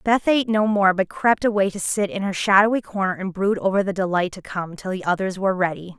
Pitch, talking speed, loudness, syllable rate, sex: 195 Hz, 250 wpm, -21 LUFS, 6.0 syllables/s, female